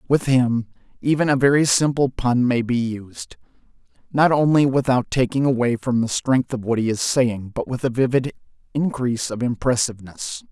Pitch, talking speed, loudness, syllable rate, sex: 125 Hz, 175 wpm, -20 LUFS, 5.0 syllables/s, male